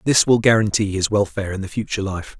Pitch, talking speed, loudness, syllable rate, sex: 105 Hz, 225 wpm, -19 LUFS, 6.6 syllables/s, male